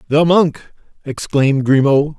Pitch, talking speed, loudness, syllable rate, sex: 145 Hz, 110 wpm, -14 LUFS, 4.2 syllables/s, male